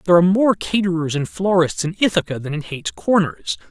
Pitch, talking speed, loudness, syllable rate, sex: 170 Hz, 195 wpm, -19 LUFS, 5.8 syllables/s, male